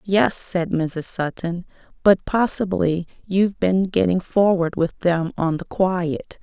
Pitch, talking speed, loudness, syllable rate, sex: 180 Hz, 140 wpm, -21 LUFS, 3.7 syllables/s, female